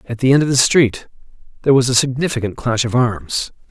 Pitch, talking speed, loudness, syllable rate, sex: 125 Hz, 210 wpm, -16 LUFS, 5.9 syllables/s, male